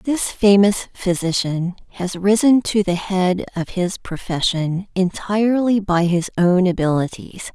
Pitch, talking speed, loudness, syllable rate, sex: 190 Hz, 125 wpm, -18 LUFS, 4.2 syllables/s, female